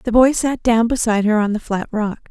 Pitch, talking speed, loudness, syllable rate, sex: 225 Hz, 260 wpm, -17 LUFS, 5.3 syllables/s, female